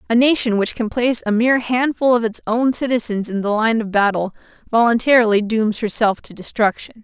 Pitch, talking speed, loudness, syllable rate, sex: 225 Hz, 190 wpm, -17 LUFS, 5.6 syllables/s, female